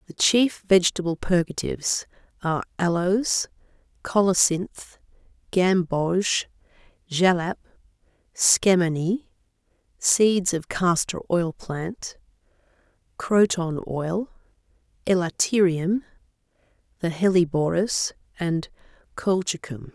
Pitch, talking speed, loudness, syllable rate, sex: 180 Hz, 65 wpm, -23 LUFS, 3.7 syllables/s, female